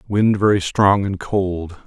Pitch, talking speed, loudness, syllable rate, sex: 95 Hz, 160 wpm, -18 LUFS, 3.6 syllables/s, male